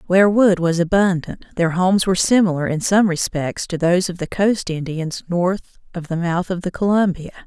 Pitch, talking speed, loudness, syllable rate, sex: 180 Hz, 195 wpm, -18 LUFS, 5.4 syllables/s, female